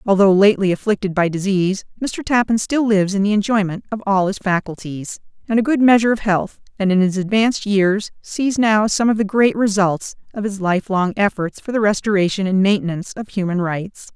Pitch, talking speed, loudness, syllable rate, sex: 200 Hz, 195 wpm, -18 LUFS, 5.6 syllables/s, female